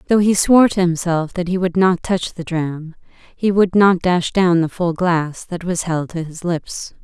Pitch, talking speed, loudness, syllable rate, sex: 175 Hz, 220 wpm, -17 LUFS, 4.2 syllables/s, female